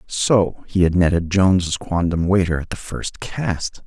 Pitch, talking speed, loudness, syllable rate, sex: 90 Hz, 170 wpm, -19 LUFS, 4.1 syllables/s, male